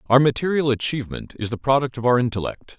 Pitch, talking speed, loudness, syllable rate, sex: 130 Hz, 195 wpm, -21 LUFS, 6.4 syllables/s, male